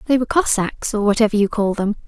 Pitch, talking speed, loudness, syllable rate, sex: 215 Hz, 230 wpm, -18 LUFS, 6.6 syllables/s, female